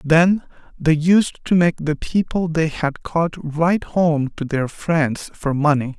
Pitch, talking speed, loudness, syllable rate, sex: 160 Hz, 170 wpm, -19 LUFS, 3.6 syllables/s, male